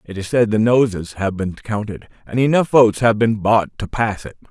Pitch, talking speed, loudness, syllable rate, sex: 110 Hz, 225 wpm, -17 LUFS, 5.1 syllables/s, male